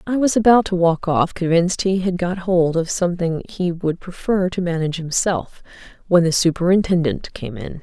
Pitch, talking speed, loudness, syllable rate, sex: 175 Hz, 185 wpm, -19 LUFS, 5.1 syllables/s, female